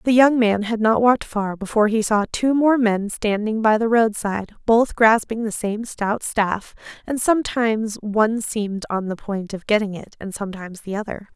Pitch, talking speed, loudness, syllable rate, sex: 215 Hz, 200 wpm, -20 LUFS, 5.0 syllables/s, female